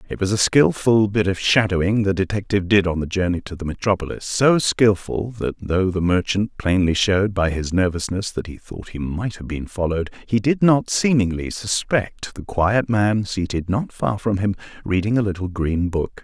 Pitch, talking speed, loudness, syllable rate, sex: 100 Hz, 195 wpm, -20 LUFS, 5.0 syllables/s, male